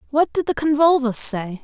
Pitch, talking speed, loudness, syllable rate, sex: 280 Hz, 185 wpm, -18 LUFS, 5.8 syllables/s, female